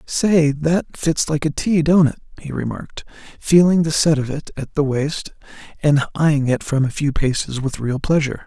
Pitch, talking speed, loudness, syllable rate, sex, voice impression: 150 Hz, 200 wpm, -18 LUFS, 4.7 syllables/s, male, masculine, adult-like, slightly raspy, slightly sincere, calm, friendly, slightly reassuring